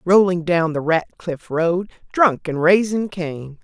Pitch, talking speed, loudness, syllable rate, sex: 175 Hz, 150 wpm, -19 LUFS, 3.7 syllables/s, female